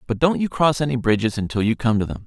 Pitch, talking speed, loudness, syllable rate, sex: 125 Hz, 290 wpm, -20 LUFS, 6.6 syllables/s, male